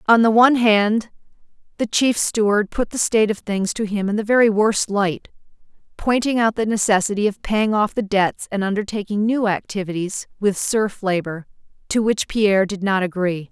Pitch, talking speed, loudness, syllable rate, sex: 210 Hz, 180 wpm, -19 LUFS, 5.1 syllables/s, female